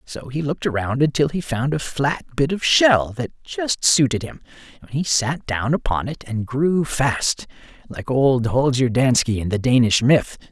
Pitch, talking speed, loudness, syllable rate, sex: 135 Hz, 190 wpm, -20 LUFS, 4.5 syllables/s, male